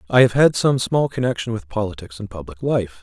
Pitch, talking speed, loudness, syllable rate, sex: 115 Hz, 220 wpm, -19 LUFS, 5.7 syllables/s, male